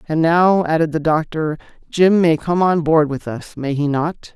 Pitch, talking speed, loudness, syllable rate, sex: 160 Hz, 205 wpm, -17 LUFS, 4.4 syllables/s, male